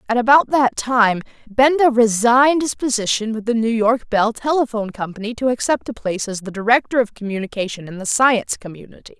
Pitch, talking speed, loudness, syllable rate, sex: 230 Hz, 185 wpm, -18 LUFS, 5.9 syllables/s, female